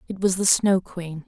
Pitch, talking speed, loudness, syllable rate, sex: 185 Hz, 235 wpm, -21 LUFS, 4.5 syllables/s, female